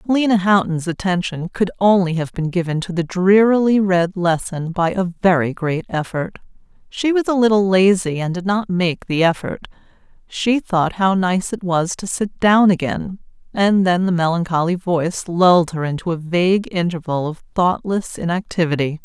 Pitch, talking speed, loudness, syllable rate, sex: 180 Hz, 165 wpm, -18 LUFS, 4.8 syllables/s, female